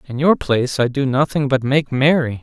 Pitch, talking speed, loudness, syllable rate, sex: 135 Hz, 225 wpm, -17 LUFS, 5.2 syllables/s, male